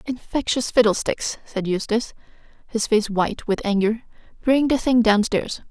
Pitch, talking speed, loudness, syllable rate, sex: 225 Hz, 135 wpm, -21 LUFS, 4.8 syllables/s, female